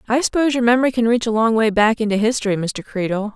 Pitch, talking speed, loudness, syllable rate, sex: 225 Hz, 250 wpm, -18 LUFS, 6.6 syllables/s, female